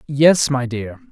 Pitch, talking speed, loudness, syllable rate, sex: 140 Hz, 160 wpm, -16 LUFS, 3.5 syllables/s, male